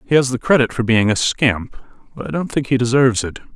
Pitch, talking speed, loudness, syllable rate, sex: 125 Hz, 255 wpm, -17 LUFS, 5.7 syllables/s, male